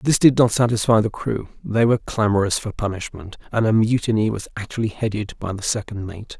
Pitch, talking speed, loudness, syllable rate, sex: 110 Hz, 195 wpm, -21 LUFS, 5.7 syllables/s, male